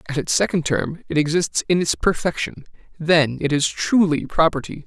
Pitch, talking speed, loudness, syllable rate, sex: 160 Hz, 175 wpm, -20 LUFS, 5.1 syllables/s, male